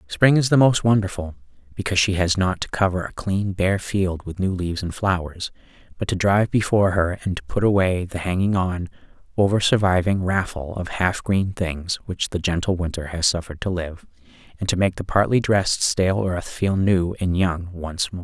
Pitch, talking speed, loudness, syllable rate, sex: 95 Hz, 200 wpm, -21 LUFS, 5.2 syllables/s, male